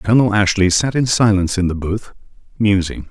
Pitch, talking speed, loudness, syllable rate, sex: 100 Hz, 175 wpm, -16 LUFS, 5.7 syllables/s, male